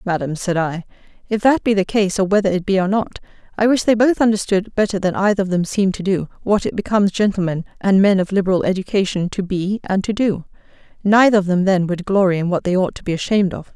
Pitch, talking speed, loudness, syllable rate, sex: 195 Hz, 230 wpm, -18 LUFS, 6.3 syllables/s, female